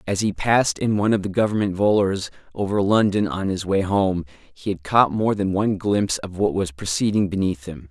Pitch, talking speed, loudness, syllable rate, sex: 95 Hz, 210 wpm, -21 LUFS, 5.4 syllables/s, male